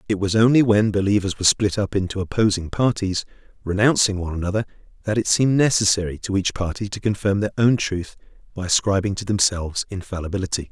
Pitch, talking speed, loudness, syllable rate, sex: 100 Hz, 175 wpm, -20 LUFS, 6.4 syllables/s, male